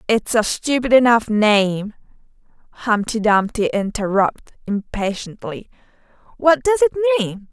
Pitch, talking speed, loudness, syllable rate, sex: 235 Hz, 105 wpm, -18 LUFS, 4.3 syllables/s, female